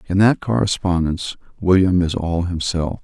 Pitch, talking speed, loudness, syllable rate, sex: 90 Hz, 140 wpm, -19 LUFS, 4.9 syllables/s, male